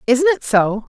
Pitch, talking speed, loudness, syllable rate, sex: 260 Hz, 190 wpm, -16 LUFS, 4.0 syllables/s, female